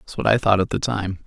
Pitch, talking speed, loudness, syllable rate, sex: 100 Hz, 380 wpm, -21 LUFS, 6.7 syllables/s, male